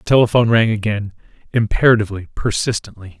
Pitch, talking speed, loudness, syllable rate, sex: 110 Hz, 95 wpm, -17 LUFS, 6.7 syllables/s, male